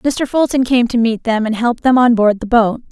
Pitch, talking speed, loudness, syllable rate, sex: 235 Hz, 265 wpm, -14 LUFS, 5.3 syllables/s, female